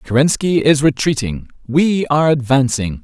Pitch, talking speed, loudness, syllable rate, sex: 140 Hz, 120 wpm, -15 LUFS, 4.7 syllables/s, male